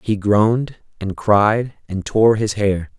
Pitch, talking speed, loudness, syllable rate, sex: 105 Hz, 160 wpm, -17 LUFS, 3.6 syllables/s, male